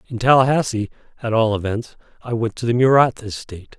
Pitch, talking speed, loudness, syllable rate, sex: 115 Hz, 175 wpm, -18 LUFS, 5.9 syllables/s, male